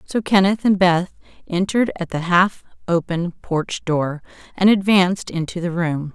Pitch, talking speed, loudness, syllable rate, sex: 180 Hz, 155 wpm, -19 LUFS, 4.6 syllables/s, female